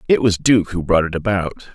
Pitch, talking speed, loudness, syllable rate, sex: 95 Hz, 240 wpm, -17 LUFS, 5.8 syllables/s, male